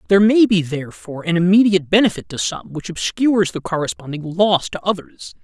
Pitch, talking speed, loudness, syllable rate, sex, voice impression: 175 Hz, 175 wpm, -18 LUFS, 6.1 syllables/s, male, masculine, adult-like, slightly middle-aged, slightly thick, tensed, slightly powerful, very bright, slightly hard, very clear, fluent, slightly cool, very intellectual, refreshing, sincere, calm, slightly mature, slightly friendly, reassuring, unique, elegant, slightly sweet, slightly lively, slightly strict, slightly sharp